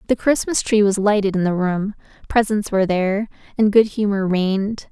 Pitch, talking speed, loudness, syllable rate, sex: 205 Hz, 185 wpm, -19 LUFS, 5.4 syllables/s, female